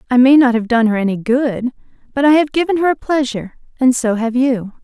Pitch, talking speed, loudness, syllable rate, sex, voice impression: 255 Hz, 235 wpm, -15 LUFS, 5.8 syllables/s, female, very feminine, slightly young, adult-like, very thin, very tensed, powerful, very bright, slightly hard, very clear, very fluent, very cute, intellectual, very refreshing, sincere, slightly calm, very friendly, reassuring, very unique, elegant, slightly wild, very sweet, lively, slightly kind, intense, slightly sharp, slightly modest, very light